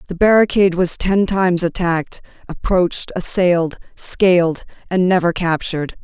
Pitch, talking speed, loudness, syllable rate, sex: 180 Hz, 120 wpm, -17 LUFS, 5.1 syllables/s, female